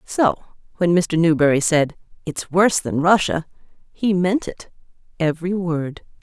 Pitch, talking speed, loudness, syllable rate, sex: 170 Hz, 135 wpm, -19 LUFS, 4.5 syllables/s, female